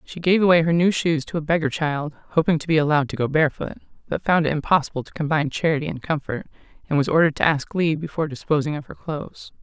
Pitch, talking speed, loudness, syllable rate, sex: 155 Hz, 230 wpm, -22 LUFS, 7.1 syllables/s, female